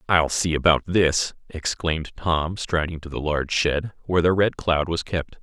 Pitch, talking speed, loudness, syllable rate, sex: 80 Hz, 190 wpm, -23 LUFS, 4.7 syllables/s, male